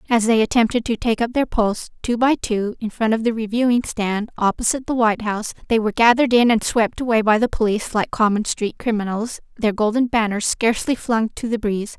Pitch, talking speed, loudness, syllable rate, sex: 225 Hz, 215 wpm, -19 LUFS, 5.9 syllables/s, female